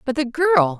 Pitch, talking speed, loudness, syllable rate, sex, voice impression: 230 Hz, 225 wpm, -18 LUFS, 4.4 syllables/s, female, feminine, adult-like, clear, slightly intellectual, slightly calm